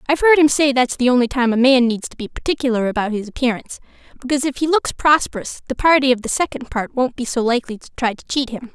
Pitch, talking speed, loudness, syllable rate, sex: 255 Hz, 255 wpm, -18 LUFS, 6.8 syllables/s, female